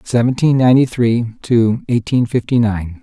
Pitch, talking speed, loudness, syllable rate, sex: 120 Hz, 140 wpm, -15 LUFS, 4.7 syllables/s, male